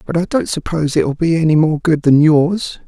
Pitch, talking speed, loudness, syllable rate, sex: 160 Hz, 230 wpm, -14 LUFS, 5.3 syllables/s, male